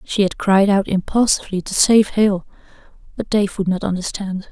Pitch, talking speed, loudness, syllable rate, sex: 195 Hz, 175 wpm, -17 LUFS, 5.1 syllables/s, female